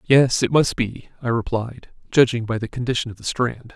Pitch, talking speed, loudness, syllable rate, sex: 120 Hz, 210 wpm, -21 LUFS, 5.1 syllables/s, male